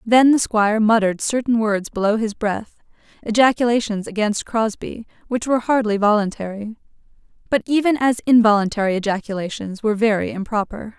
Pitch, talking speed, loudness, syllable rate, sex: 220 Hz, 125 wpm, -19 LUFS, 5.7 syllables/s, female